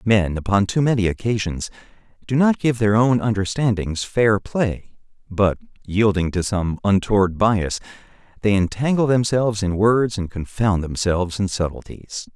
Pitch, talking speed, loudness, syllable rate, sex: 105 Hz, 140 wpm, -20 LUFS, 4.6 syllables/s, male